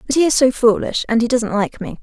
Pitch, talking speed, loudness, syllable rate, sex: 245 Hz, 295 wpm, -16 LUFS, 5.9 syllables/s, female